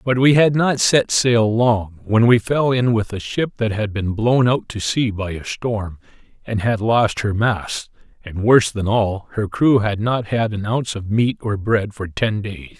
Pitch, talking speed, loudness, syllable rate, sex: 110 Hz, 220 wpm, -18 LUFS, 4.2 syllables/s, male